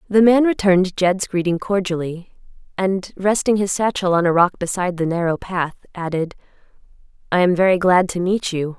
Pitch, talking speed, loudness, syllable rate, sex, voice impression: 185 Hz, 170 wpm, -19 LUFS, 5.2 syllables/s, female, feminine, adult-like, tensed, soft, clear, raspy, intellectual, calm, reassuring, elegant, kind, slightly modest